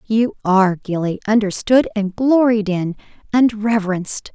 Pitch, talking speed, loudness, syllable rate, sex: 210 Hz, 125 wpm, -17 LUFS, 4.6 syllables/s, female